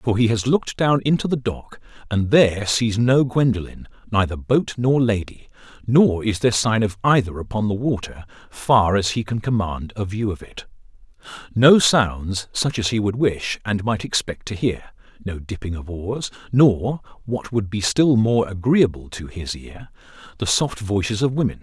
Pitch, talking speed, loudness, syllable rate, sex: 110 Hz, 175 wpm, -20 LUFS, 4.7 syllables/s, male